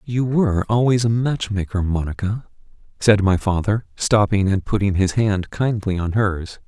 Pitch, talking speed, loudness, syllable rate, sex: 105 Hz, 160 wpm, -20 LUFS, 4.6 syllables/s, male